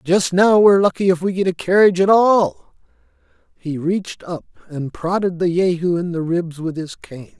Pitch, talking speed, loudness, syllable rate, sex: 175 Hz, 195 wpm, -17 LUFS, 5.0 syllables/s, male